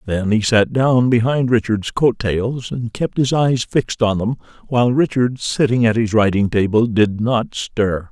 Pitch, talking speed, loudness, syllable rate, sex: 115 Hz, 185 wpm, -17 LUFS, 4.3 syllables/s, male